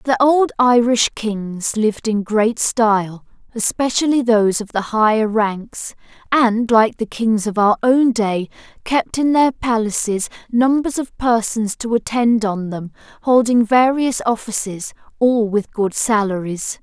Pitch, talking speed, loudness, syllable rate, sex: 225 Hz, 135 wpm, -17 LUFS, 4.0 syllables/s, female